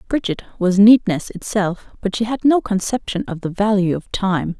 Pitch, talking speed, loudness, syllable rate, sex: 200 Hz, 185 wpm, -18 LUFS, 4.9 syllables/s, female